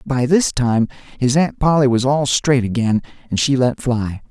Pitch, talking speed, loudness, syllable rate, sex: 130 Hz, 195 wpm, -17 LUFS, 4.5 syllables/s, male